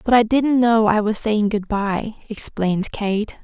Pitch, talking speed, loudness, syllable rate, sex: 215 Hz, 190 wpm, -19 LUFS, 4.1 syllables/s, female